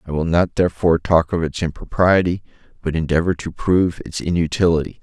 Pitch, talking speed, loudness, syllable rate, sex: 85 Hz, 165 wpm, -19 LUFS, 6.0 syllables/s, male